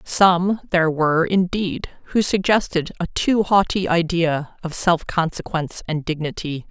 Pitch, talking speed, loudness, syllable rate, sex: 175 Hz, 135 wpm, -20 LUFS, 4.3 syllables/s, female